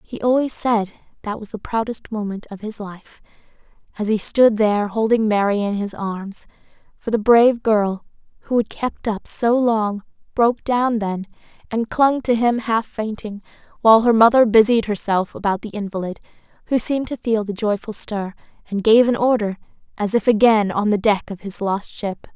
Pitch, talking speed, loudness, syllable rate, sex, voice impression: 215 Hz, 185 wpm, -19 LUFS, 5.0 syllables/s, female, very feminine, young, very thin, tensed, slightly weak, bright, slightly soft, clear, fluent, very cute, slightly intellectual, very refreshing, sincere, calm, very friendly, very reassuring, unique, elegant, sweet, lively, kind, slightly modest